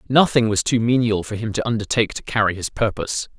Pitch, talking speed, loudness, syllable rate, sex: 110 Hz, 215 wpm, -20 LUFS, 6.4 syllables/s, male